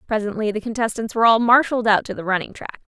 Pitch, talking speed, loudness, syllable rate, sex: 220 Hz, 225 wpm, -19 LUFS, 7.1 syllables/s, female